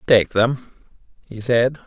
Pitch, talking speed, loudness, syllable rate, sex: 125 Hz, 130 wpm, -19 LUFS, 3.4 syllables/s, male